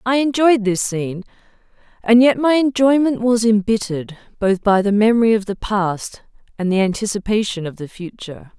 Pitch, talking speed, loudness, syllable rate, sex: 215 Hz, 160 wpm, -17 LUFS, 5.3 syllables/s, female